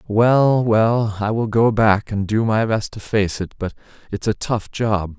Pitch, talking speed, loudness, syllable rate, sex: 110 Hz, 210 wpm, -19 LUFS, 3.9 syllables/s, male